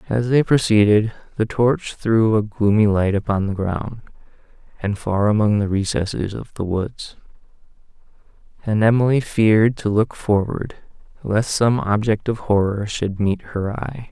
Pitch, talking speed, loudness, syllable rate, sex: 110 Hz, 150 wpm, -19 LUFS, 4.4 syllables/s, male